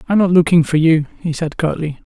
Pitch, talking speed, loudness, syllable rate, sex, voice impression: 165 Hz, 255 wpm, -15 LUFS, 6.3 syllables/s, male, very masculine, slightly old, very thick, slightly tensed, slightly bright, slightly soft, clear, fluent, slightly raspy, slightly cool, intellectual, slightly refreshing, sincere, very calm, very mature, friendly, slightly reassuring, slightly unique, elegant, wild, slightly sweet, slightly lively, kind, modest